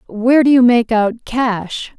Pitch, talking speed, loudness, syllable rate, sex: 235 Hz, 180 wpm, -14 LUFS, 4.0 syllables/s, female